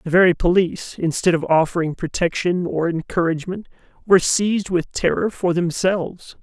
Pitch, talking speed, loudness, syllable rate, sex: 175 Hz, 140 wpm, -19 LUFS, 5.4 syllables/s, male